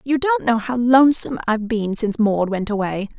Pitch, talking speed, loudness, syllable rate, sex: 235 Hz, 205 wpm, -19 LUFS, 6.1 syllables/s, female